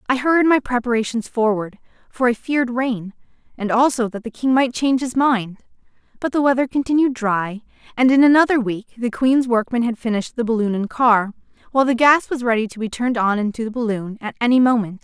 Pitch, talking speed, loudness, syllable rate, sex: 240 Hz, 205 wpm, -19 LUFS, 5.9 syllables/s, female